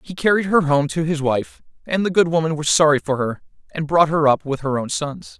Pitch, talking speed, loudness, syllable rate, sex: 150 Hz, 255 wpm, -19 LUFS, 5.5 syllables/s, male